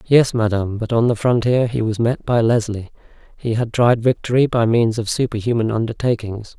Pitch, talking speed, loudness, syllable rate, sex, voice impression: 115 Hz, 180 wpm, -18 LUFS, 5.3 syllables/s, male, very masculine, very adult-like, very middle-aged, very thick, slightly tensed, slightly powerful, slightly dark, soft, fluent, very cool, intellectual, very sincere, calm, friendly, reassuring, elegant, slightly wild, sweet, very kind, very modest